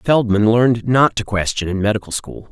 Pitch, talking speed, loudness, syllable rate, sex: 110 Hz, 190 wpm, -17 LUFS, 5.3 syllables/s, male